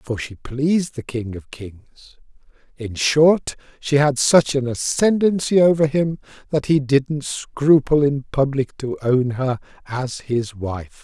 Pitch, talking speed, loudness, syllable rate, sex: 135 Hz, 150 wpm, -19 LUFS, 3.7 syllables/s, male